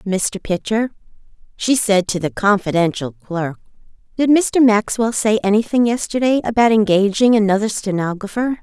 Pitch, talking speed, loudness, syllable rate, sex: 210 Hz, 125 wpm, -17 LUFS, 4.8 syllables/s, female